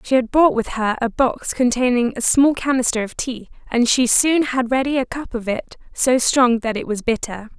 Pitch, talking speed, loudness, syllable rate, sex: 245 Hz, 220 wpm, -18 LUFS, 5.0 syllables/s, female